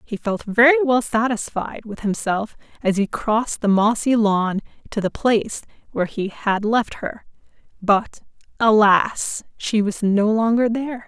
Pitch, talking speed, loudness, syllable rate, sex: 220 Hz, 150 wpm, -20 LUFS, 4.3 syllables/s, female